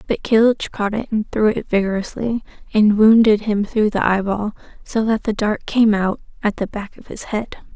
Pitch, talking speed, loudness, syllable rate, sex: 215 Hz, 200 wpm, -18 LUFS, 4.8 syllables/s, female